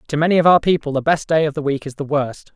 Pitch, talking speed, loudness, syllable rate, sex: 150 Hz, 330 wpm, -18 LUFS, 6.6 syllables/s, male